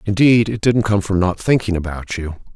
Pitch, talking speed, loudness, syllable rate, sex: 100 Hz, 210 wpm, -17 LUFS, 5.2 syllables/s, male